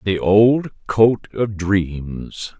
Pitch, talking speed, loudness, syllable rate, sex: 100 Hz, 115 wpm, -18 LUFS, 2.2 syllables/s, male